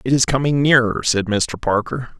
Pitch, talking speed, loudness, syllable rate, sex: 120 Hz, 190 wpm, -18 LUFS, 5.0 syllables/s, male